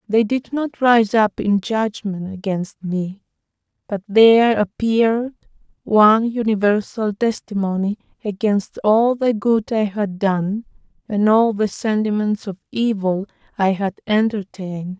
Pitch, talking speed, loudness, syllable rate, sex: 210 Hz, 125 wpm, -19 LUFS, 4.0 syllables/s, female